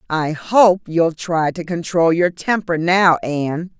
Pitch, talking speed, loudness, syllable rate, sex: 170 Hz, 160 wpm, -17 LUFS, 3.8 syllables/s, female